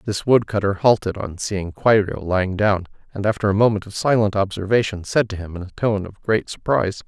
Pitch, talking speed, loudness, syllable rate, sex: 100 Hz, 205 wpm, -20 LUFS, 5.6 syllables/s, male